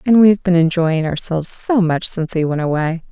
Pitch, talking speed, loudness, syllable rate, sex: 170 Hz, 230 wpm, -16 LUFS, 5.8 syllables/s, female